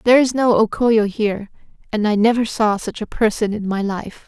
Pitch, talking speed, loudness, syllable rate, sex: 215 Hz, 225 wpm, -18 LUFS, 5.4 syllables/s, female